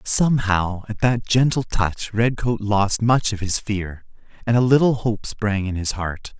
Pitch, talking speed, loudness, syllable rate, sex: 110 Hz, 180 wpm, -20 LUFS, 4.1 syllables/s, male